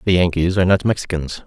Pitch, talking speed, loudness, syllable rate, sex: 90 Hz, 205 wpm, -18 LUFS, 6.8 syllables/s, male